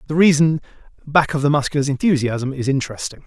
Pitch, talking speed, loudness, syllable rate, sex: 145 Hz, 165 wpm, -18 LUFS, 6.5 syllables/s, male